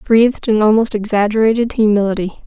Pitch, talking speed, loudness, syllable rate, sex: 215 Hz, 120 wpm, -14 LUFS, 6.3 syllables/s, female